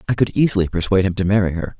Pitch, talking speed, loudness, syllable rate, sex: 100 Hz, 270 wpm, -18 LUFS, 8.1 syllables/s, male